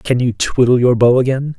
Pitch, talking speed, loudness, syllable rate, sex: 125 Hz, 230 wpm, -14 LUFS, 5.2 syllables/s, male